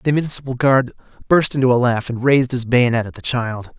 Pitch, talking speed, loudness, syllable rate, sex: 125 Hz, 220 wpm, -17 LUFS, 6.1 syllables/s, male